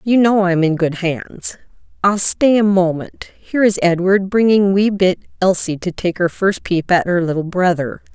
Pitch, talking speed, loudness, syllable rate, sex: 185 Hz, 200 wpm, -16 LUFS, 4.7 syllables/s, female